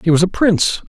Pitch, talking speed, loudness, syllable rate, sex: 180 Hz, 255 wpm, -15 LUFS, 6.7 syllables/s, male